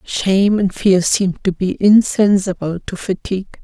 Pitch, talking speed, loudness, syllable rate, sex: 190 Hz, 150 wpm, -16 LUFS, 4.6 syllables/s, female